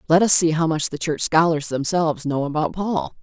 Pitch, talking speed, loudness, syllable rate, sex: 160 Hz, 225 wpm, -20 LUFS, 5.3 syllables/s, female